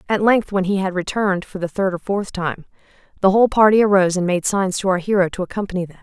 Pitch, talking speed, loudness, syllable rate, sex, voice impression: 190 Hz, 250 wpm, -18 LUFS, 6.7 syllables/s, female, feminine, adult-like, tensed, powerful, soft, raspy, intellectual, calm, friendly, reassuring, elegant, lively, modest